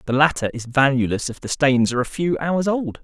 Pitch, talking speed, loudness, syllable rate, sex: 140 Hz, 235 wpm, -20 LUFS, 5.7 syllables/s, male